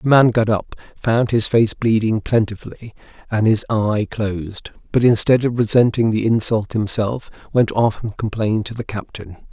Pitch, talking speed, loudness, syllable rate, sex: 110 Hz, 170 wpm, -18 LUFS, 4.9 syllables/s, male